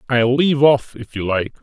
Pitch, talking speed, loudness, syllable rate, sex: 125 Hz, 220 wpm, -17 LUFS, 5.2 syllables/s, male